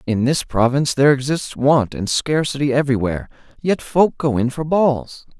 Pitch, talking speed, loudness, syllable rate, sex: 135 Hz, 165 wpm, -18 LUFS, 5.2 syllables/s, male